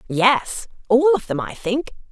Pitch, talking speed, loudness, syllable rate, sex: 240 Hz, 170 wpm, -19 LUFS, 3.8 syllables/s, female